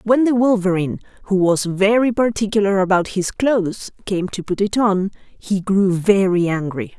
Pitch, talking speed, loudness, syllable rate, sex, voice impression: 195 Hz, 165 wpm, -18 LUFS, 4.8 syllables/s, female, very feminine, slightly young, adult-like, very thin, tensed, slightly powerful, bright, hard, very clear, fluent, slightly cute, intellectual, slightly refreshing, very sincere, calm, slightly friendly, slightly reassuring, unique, elegant, slightly wild, slightly sweet, slightly strict, slightly intense, slightly sharp